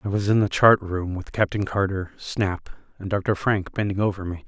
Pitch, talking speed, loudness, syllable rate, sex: 95 Hz, 215 wpm, -23 LUFS, 4.9 syllables/s, male